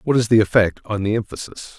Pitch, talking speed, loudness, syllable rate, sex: 105 Hz, 235 wpm, -18 LUFS, 5.9 syllables/s, male